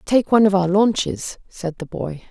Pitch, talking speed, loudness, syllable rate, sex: 185 Hz, 210 wpm, -19 LUFS, 4.9 syllables/s, female